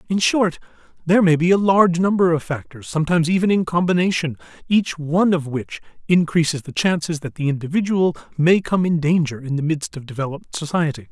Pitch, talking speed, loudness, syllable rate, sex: 165 Hz, 185 wpm, -19 LUFS, 6.0 syllables/s, male